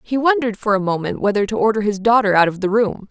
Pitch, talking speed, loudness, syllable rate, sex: 210 Hz, 270 wpm, -17 LUFS, 6.6 syllables/s, female